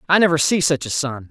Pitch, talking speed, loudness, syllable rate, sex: 150 Hz, 275 wpm, -18 LUFS, 6.2 syllables/s, male